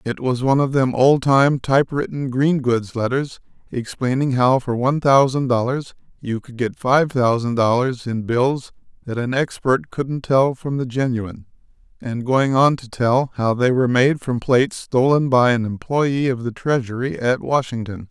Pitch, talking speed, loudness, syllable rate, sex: 130 Hz, 175 wpm, -19 LUFS, 4.6 syllables/s, male